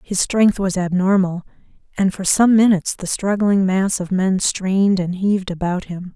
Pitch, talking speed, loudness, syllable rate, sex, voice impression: 190 Hz, 175 wpm, -18 LUFS, 4.7 syllables/s, female, feminine, slightly gender-neutral, slightly young, adult-like, slightly thin, very relaxed, very dark, slightly soft, muffled, fluent, slightly raspy, very cute, intellectual, sincere, very calm, very friendly, very reassuring, sweet, kind, very modest